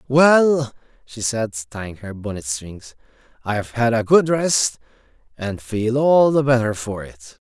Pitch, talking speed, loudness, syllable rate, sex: 115 Hz, 155 wpm, -19 LUFS, 4.0 syllables/s, male